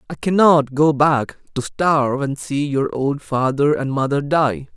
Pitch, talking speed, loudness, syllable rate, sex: 145 Hz, 175 wpm, -18 LUFS, 4.1 syllables/s, male